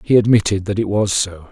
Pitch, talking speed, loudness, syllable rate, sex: 100 Hz, 240 wpm, -17 LUFS, 5.7 syllables/s, male